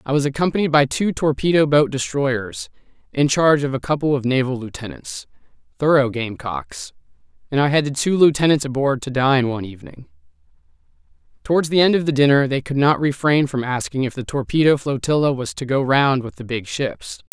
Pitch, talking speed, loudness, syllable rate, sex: 140 Hz, 185 wpm, -19 LUFS, 5.7 syllables/s, male